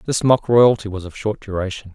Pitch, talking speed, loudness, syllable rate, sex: 105 Hz, 215 wpm, -18 LUFS, 5.5 syllables/s, male